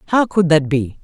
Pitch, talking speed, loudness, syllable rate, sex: 165 Hz, 230 wpm, -16 LUFS, 5.1 syllables/s, female